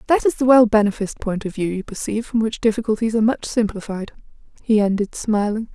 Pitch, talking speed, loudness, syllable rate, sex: 220 Hz, 200 wpm, -20 LUFS, 6.4 syllables/s, female